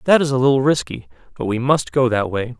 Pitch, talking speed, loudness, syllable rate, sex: 125 Hz, 255 wpm, -18 LUFS, 6.0 syllables/s, male